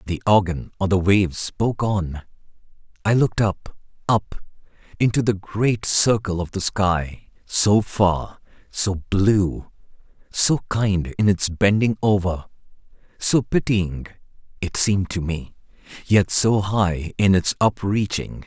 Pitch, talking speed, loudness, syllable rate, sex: 100 Hz, 135 wpm, -20 LUFS, 3.8 syllables/s, male